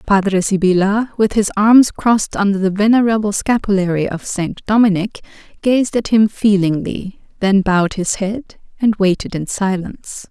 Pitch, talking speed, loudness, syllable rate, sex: 205 Hz, 145 wpm, -15 LUFS, 4.8 syllables/s, female